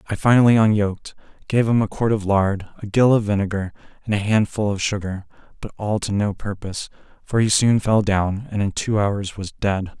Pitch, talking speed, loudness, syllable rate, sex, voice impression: 105 Hz, 205 wpm, -20 LUFS, 5.3 syllables/s, male, adult-like, slightly middle-aged, thick, tensed, slightly powerful, bright, slightly soft, slightly clear, fluent, cool, very intellectual, slightly refreshing, very sincere, very calm, mature, reassuring, slightly unique, elegant, slightly wild, slightly sweet, lively, kind, slightly modest